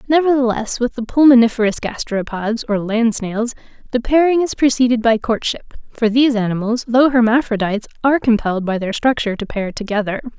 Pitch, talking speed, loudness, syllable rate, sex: 235 Hz, 155 wpm, -17 LUFS, 5.9 syllables/s, female